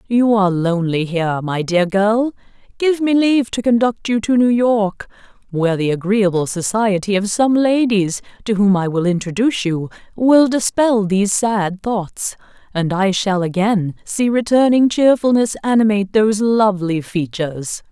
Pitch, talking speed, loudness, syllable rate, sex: 205 Hz, 150 wpm, -16 LUFS, 4.8 syllables/s, female